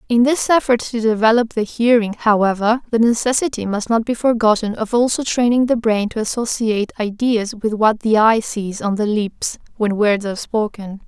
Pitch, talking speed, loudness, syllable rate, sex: 220 Hz, 185 wpm, -17 LUFS, 5.0 syllables/s, female